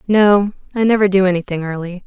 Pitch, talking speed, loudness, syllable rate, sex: 190 Hz, 145 wpm, -16 LUFS, 5.9 syllables/s, female